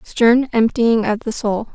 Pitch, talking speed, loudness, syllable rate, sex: 230 Hz, 170 wpm, -17 LUFS, 3.8 syllables/s, female